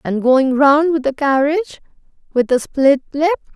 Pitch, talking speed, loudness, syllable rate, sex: 285 Hz, 170 wpm, -15 LUFS, 4.6 syllables/s, female